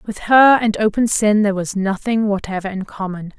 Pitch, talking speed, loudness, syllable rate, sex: 205 Hz, 195 wpm, -17 LUFS, 5.2 syllables/s, female